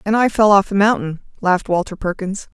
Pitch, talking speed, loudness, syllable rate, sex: 200 Hz, 210 wpm, -17 LUFS, 5.8 syllables/s, female